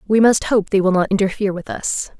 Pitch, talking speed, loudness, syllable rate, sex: 200 Hz, 245 wpm, -18 LUFS, 6.2 syllables/s, female